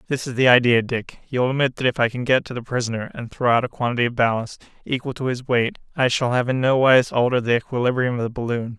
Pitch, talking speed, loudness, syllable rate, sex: 125 Hz, 260 wpm, -20 LUFS, 6.6 syllables/s, male